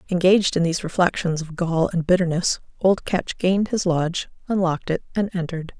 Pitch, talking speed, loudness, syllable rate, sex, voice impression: 175 Hz, 175 wpm, -22 LUFS, 5.9 syllables/s, female, very feminine, slightly old, very thin, tensed, weak, bright, very hard, very clear, fluent, slightly raspy, very cute, very intellectual, very refreshing, sincere, very calm, very friendly, very reassuring, very unique, very elegant, slightly wild, slightly sweet, lively, kind, slightly modest